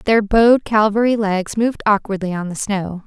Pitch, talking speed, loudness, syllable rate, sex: 210 Hz, 175 wpm, -17 LUFS, 5.0 syllables/s, female